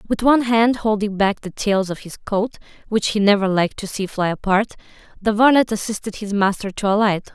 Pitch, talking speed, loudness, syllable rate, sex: 205 Hz, 205 wpm, -19 LUFS, 4.4 syllables/s, female